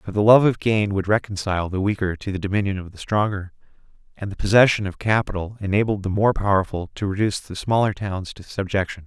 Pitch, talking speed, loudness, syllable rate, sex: 100 Hz, 205 wpm, -21 LUFS, 6.1 syllables/s, male